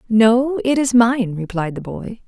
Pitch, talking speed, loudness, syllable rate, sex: 230 Hz, 185 wpm, -17 LUFS, 3.9 syllables/s, female